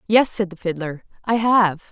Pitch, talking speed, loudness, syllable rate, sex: 195 Hz, 190 wpm, -20 LUFS, 4.6 syllables/s, female